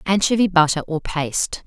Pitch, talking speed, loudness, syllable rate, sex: 170 Hz, 180 wpm, -19 LUFS, 6.3 syllables/s, female